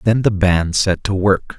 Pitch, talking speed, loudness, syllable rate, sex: 95 Hz, 225 wpm, -16 LUFS, 4.1 syllables/s, male